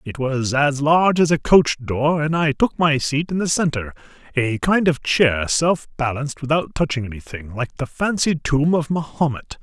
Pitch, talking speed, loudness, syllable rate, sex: 145 Hz, 195 wpm, -19 LUFS, 4.7 syllables/s, male